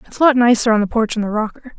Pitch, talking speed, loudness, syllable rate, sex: 230 Hz, 335 wpm, -16 LUFS, 7.4 syllables/s, female